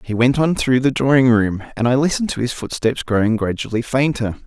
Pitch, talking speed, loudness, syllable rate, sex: 125 Hz, 215 wpm, -18 LUFS, 5.7 syllables/s, male